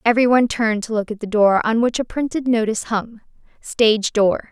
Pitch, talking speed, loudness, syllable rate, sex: 225 Hz, 210 wpm, -18 LUFS, 6.0 syllables/s, female